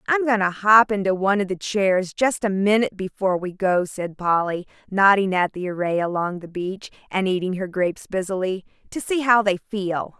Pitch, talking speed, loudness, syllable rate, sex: 195 Hz, 200 wpm, -21 LUFS, 5.2 syllables/s, female